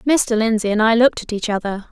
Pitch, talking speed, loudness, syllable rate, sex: 225 Hz, 250 wpm, -17 LUFS, 5.9 syllables/s, female